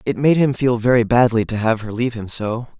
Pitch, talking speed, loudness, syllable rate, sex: 120 Hz, 255 wpm, -18 LUFS, 5.8 syllables/s, male